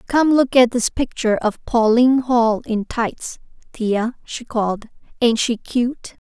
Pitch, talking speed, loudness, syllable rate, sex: 235 Hz, 155 wpm, -18 LUFS, 4.0 syllables/s, female